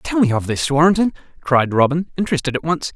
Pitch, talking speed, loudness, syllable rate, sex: 155 Hz, 205 wpm, -18 LUFS, 6.3 syllables/s, male